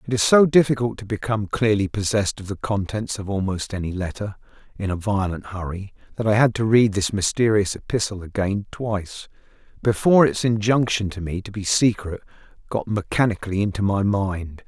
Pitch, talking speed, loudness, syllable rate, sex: 105 Hz, 170 wpm, -22 LUFS, 5.5 syllables/s, male